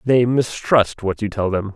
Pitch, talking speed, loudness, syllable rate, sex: 110 Hz, 205 wpm, -19 LUFS, 4.2 syllables/s, male